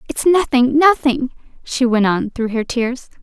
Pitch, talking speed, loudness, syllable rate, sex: 260 Hz, 165 wpm, -16 LUFS, 4.2 syllables/s, female